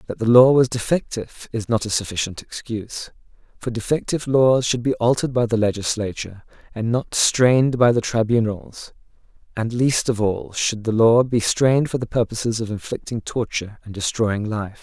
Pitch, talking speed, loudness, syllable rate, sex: 115 Hz, 175 wpm, -20 LUFS, 5.3 syllables/s, male